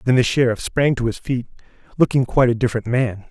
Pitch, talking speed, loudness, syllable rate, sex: 120 Hz, 220 wpm, -19 LUFS, 6.4 syllables/s, male